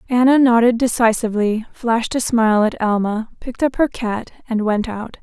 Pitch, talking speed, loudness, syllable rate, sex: 230 Hz, 170 wpm, -17 LUFS, 5.4 syllables/s, female